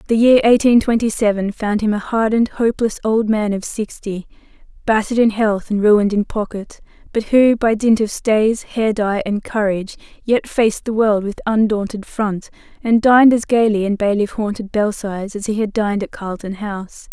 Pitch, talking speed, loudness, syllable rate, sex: 215 Hz, 185 wpm, -17 LUFS, 5.2 syllables/s, female